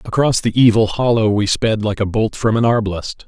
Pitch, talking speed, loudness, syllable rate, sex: 110 Hz, 220 wpm, -16 LUFS, 5.1 syllables/s, male